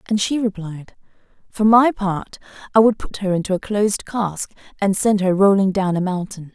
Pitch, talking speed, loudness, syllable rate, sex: 200 Hz, 195 wpm, -18 LUFS, 5.0 syllables/s, female